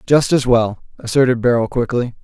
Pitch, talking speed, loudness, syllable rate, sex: 125 Hz, 160 wpm, -16 LUFS, 5.2 syllables/s, male